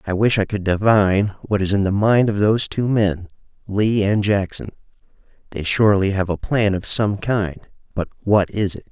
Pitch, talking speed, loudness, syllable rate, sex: 100 Hz, 195 wpm, -19 LUFS, 4.9 syllables/s, male